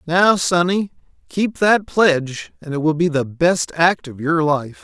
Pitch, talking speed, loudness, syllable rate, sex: 165 Hz, 185 wpm, -17 LUFS, 4.0 syllables/s, male